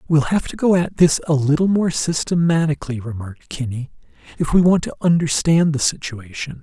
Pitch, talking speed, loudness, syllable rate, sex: 155 Hz, 170 wpm, -18 LUFS, 5.5 syllables/s, male